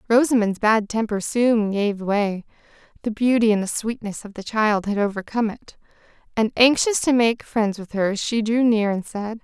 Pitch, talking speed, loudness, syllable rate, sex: 220 Hz, 180 wpm, -21 LUFS, 4.6 syllables/s, female